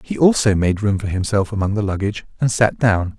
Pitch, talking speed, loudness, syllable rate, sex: 105 Hz, 225 wpm, -18 LUFS, 5.7 syllables/s, male